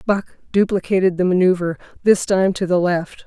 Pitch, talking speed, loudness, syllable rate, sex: 185 Hz, 165 wpm, -18 LUFS, 5.3 syllables/s, female